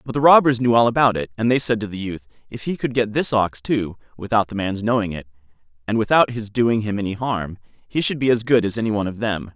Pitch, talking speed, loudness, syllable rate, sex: 110 Hz, 265 wpm, -20 LUFS, 6.2 syllables/s, male